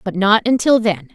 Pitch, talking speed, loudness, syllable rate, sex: 210 Hz, 210 wpm, -15 LUFS, 4.8 syllables/s, female